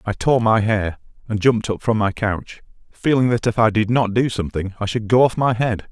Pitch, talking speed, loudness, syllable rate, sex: 110 Hz, 245 wpm, -19 LUFS, 5.5 syllables/s, male